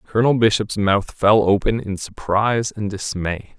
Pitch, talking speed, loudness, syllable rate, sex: 105 Hz, 150 wpm, -19 LUFS, 4.6 syllables/s, male